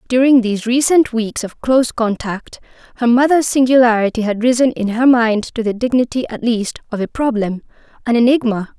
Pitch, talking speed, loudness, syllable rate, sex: 235 Hz, 170 wpm, -15 LUFS, 5.4 syllables/s, female